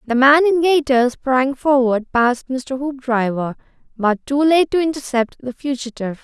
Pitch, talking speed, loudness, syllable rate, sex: 265 Hz, 155 wpm, -17 LUFS, 4.5 syllables/s, female